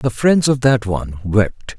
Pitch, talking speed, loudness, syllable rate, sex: 120 Hz, 200 wpm, -17 LUFS, 4.1 syllables/s, male